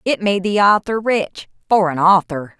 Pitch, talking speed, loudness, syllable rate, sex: 190 Hz, 160 wpm, -16 LUFS, 4.4 syllables/s, female